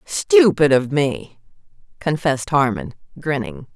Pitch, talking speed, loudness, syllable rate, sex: 145 Hz, 95 wpm, -18 LUFS, 4.0 syllables/s, female